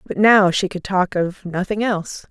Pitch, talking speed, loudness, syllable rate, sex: 190 Hz, 210 wpm, -18 LUFS, 4.6 syllables/s, female